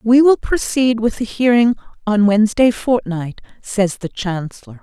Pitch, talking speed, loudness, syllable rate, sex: 220 Hz, 150 wpm, -16 LUFS, 4.4 syllables/s, female